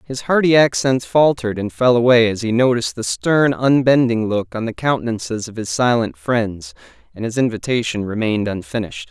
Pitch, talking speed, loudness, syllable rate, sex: 115 Hz, 170 wpm, -17 LUFS, 5.5 syllables/s, male